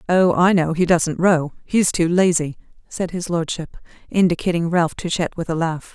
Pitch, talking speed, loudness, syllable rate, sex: 170 Hz, 180 wpm, -19 LUFS, 4.7 syllables/s, female